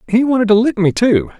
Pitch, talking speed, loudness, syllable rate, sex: 220 Hz, 260 wpm, -14 LUFS, 6.0 syllables/s, male